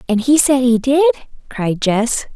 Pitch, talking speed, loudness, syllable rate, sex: 245 Hz, 180 wpm, -15 LUFS, 4.0 syllables/s, female